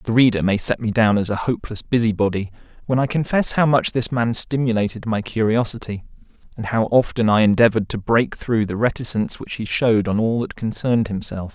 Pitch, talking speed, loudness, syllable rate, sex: 115 Hz, 195 wpm, -20 LUFS, 5.9 syllables/s, male